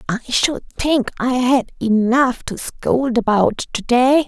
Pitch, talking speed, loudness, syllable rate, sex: 245 Hz, 155 wpm, -17 LUFS, 3.4 syllables/s, female